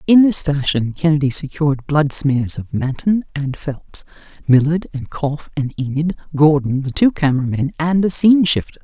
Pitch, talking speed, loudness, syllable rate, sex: 150 Hz, 170 wpm, -17 LUFS, 4.9 syllables/s, female